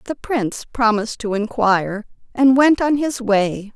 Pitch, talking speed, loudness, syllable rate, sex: 235 Hz, 160 wpm, -18 LUFS, 4.6 syllables/s, female